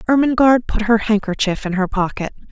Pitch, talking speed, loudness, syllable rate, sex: 220 Hz, 165 wpm, -17 LUFS, 5.9 syllables/s, female